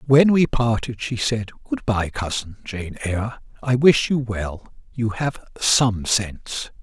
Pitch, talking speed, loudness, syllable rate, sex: 115 Hz, 160 wpm, -21 LUFS, 3.7 syllables/s, male